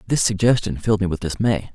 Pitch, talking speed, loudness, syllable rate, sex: 100 Hz, 205 wpm, -20 LUFS, 6.3 syllables/s, male